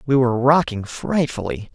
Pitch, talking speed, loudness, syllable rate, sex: 130 Hz, 140 wpm, -20 LUFS, 5.0 syllables/s, male